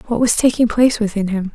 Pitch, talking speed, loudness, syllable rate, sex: 220 Hz, 235 wpm, -16 LUFS, 6.6 syllables/s, female